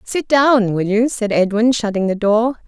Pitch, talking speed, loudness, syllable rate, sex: 220 Hz, 200 wpm, -16 LUFS, 4.3 syllables/s, female